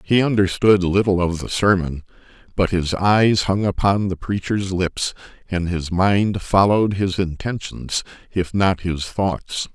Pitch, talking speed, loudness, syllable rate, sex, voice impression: 95 Hz, 150 wpm, -20 LUFS, 4.0 syllables/s, male, very masculine, very adult-like, middle-aged, very thick, tensed, very powerful, slightly bright, soft, slightly muffled, fluent, very cool, intellectual, very sincere, very calm, very mature, very friendly, very reassuring, unique, very wild, sweet, slightly lively, kind